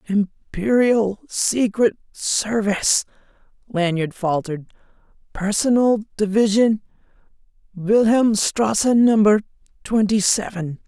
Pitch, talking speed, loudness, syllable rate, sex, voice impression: 210 Hz, 50 wpm, -19 LUFS, 3.8 syllables/s, female, feminine, very adult-like, slightly powerful, intellectual, sharp